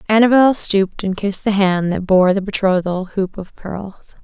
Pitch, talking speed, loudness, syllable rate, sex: 195 Hz, 185 wpm, -16 LUFS, 4.8 syllables/s, female